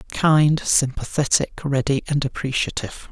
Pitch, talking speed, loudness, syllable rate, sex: 140 Hz, 95 wpm, -20 LUFS, 4.6 syllables/s, male